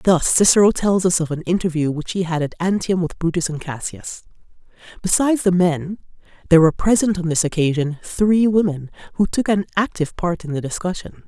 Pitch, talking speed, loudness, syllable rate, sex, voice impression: 175 Hz, 185 wpm, -19 LUFS, 5.8 syllables/s, female, feminine, adult-like, slightly fluent, slightly reassuring, elegant